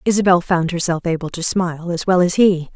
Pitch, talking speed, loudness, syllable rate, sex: 175 Hz, 220 wpm, -17 LUFS, 5.8 syllables/s, female